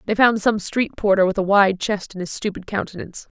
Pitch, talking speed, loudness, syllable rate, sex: 200 Hz, 230 wpm, -20 LUFS, 5.8 syllables/s, female